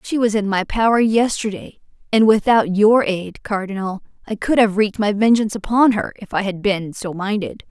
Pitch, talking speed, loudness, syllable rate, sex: 210 Hz, 195 wpm, -18 LUFS, 5.2 syllables/s, female